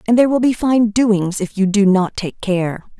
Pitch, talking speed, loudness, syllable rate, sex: 210 Hz, 240 wpm, -16 LUFS, 4.8 syllables/s, female